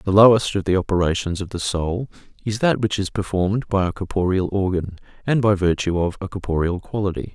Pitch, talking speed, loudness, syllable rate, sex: 95 Hz, 195 wpm, -21 LUFS, 5.7 syllables/s, male